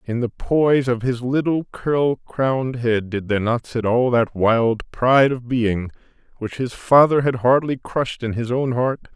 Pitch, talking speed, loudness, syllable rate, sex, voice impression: 125 Hz, 190 wpm, -19 LUFS, 4.4 syllables/s, male, very masculine, middle-aged, thick, intellectual, calm, slightly mature, elegant